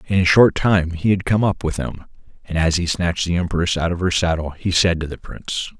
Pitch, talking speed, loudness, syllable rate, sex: 85 Hz, 260 wpm, -19 LUFS, 5.5 syllables/s, male